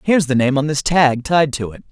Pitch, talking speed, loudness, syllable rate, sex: 145 Hz, 280 wpm, -16 LUFS, 5.7 syllables/s, male